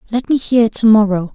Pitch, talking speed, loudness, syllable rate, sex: 220 Hz, 225 wpm, -13 LUFS, 5.5 syllables/s, female